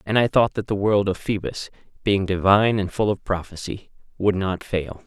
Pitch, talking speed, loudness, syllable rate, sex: 100 Hz, 200 wpm, -22 LUFS, 5.1 syllables/s, male